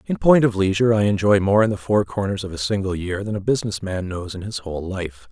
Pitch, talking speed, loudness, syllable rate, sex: 100 Hz, 270 wpm, -21 LUFS, 6.2 syllables/s, male